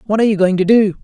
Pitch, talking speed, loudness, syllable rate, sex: 200 Hz, 350 wpm, -13 LUFS, 8.3 syllables/s, male